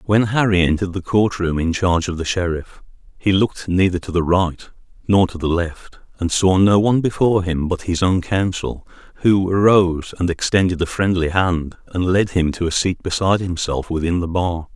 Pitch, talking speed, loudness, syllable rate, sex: 90 Hz, 200 wpm, -18 LUFS, 5.2 syllables/s, male